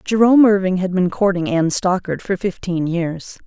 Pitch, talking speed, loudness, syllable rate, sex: 185 Hz, 175 wpm, -17 LUFS, 5.2 syllables/s, female